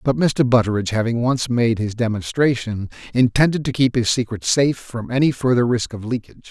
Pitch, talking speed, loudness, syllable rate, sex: 120 Hz, 185 wpm, -19 LUFS, 5.7 syllables/s, male